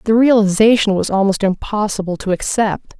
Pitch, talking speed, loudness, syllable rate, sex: 205 Hz, 140 wpm, -15 LUFS, 5.3 syllables/s, female